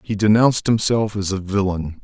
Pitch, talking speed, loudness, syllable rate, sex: 100 Hz, 175 wpm, -18 LUFS, 5.2 syllables/s, male